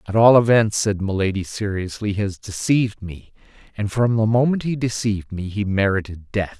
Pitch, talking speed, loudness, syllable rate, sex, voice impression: 105 Hz, 180 wpm, -20 LUFS, 5.3 syllables/s, male, masculine, adult-like, thick, tensed, slightly bright, cool, intellectual, sincere, slightly mature, slightly friendly, wild